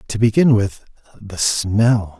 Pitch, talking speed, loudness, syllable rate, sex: 105 Hz, 135 wpm, -17 LUFS, 3.6 syllables/s, male